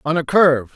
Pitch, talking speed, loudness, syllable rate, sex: 155 Hz, 235 wpm, -15 LUFS, 6.2 syllables/s, male